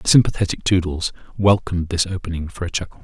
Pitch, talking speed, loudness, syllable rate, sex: 90 Hz, 180 wpm, -20 LUFS, 6.5 syllables/s, male